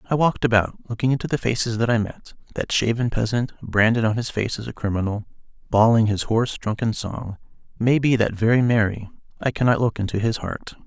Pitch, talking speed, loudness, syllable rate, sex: 115 Hz, 200 wpm, -22 LUFS, 5.8 syllables/s, male